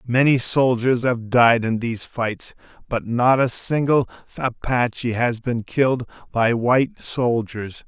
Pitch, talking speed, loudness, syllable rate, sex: 120 Hz, 135 wpm, -20 LUFS, 3.9 syllables/s, male